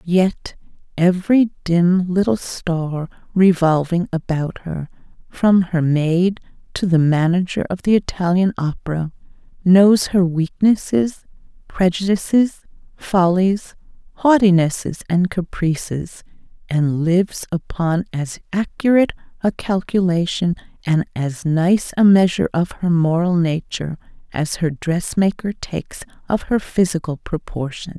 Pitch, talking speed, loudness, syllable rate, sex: 180 Hz, 105 wpm, -18 LUFS, 4.2 syllables/s, female